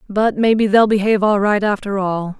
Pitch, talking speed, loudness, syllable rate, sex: 205 Hz, 200 wpm, -16 LUFS, 5.4 syllables/s, female